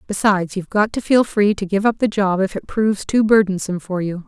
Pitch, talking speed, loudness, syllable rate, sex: 200 Hz, 255 wpm, -18 LUFS, 6.1 syllables/s, female